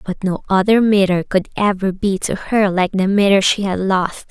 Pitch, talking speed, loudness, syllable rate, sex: 195 Hz, 210 wpm, -16 LUFS, 4.7 syllables/s, female